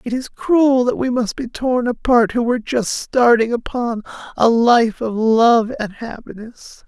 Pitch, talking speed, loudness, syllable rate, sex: 235 Hz, 175 wpm, -17 LUFS, 4.1 syllables/s, female